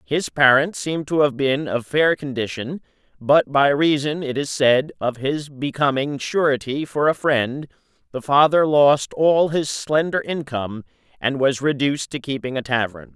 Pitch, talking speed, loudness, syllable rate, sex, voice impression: 140 Hz, 165 wpm, -20 LUFS, 4.4 syllables/s, male, masculine, adult-like, slightly middle-aged, slightly thick, very tensed, slightly powerful, very bright, slightly hard, clear, very fluent, slightly cool, intellectual, slightly refreshing, very sincere, calm, mature, friendly, reassuring, slightly unique, wild, slightly sweet, lively, kind, slightly intense